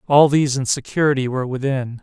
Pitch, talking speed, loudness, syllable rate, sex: 135 Hz, 180 wpm, -18 LUFS, 6.4 syllables/s, male